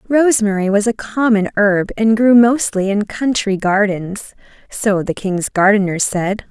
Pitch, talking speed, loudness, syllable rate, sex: 210 Hz, 150 wpm, -15 LUFS, 4.3 syllables/s, female